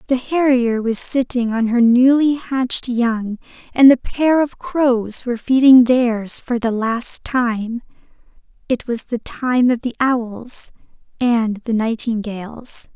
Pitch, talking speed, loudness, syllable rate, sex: 240 Hz, 140 wpm, -17 LUFS, 3.6 syllables/s, female